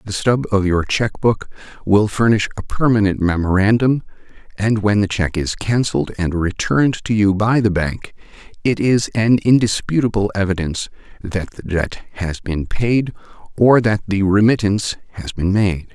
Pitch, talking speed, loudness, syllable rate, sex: 105 Hz, 160 wpm, -17 LUFS, 4.7 syllables/s, male